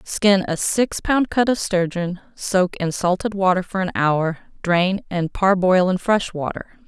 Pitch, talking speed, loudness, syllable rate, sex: 185 Hz, 175 wpm, -20 LUFS, 4.0 syllables/s, female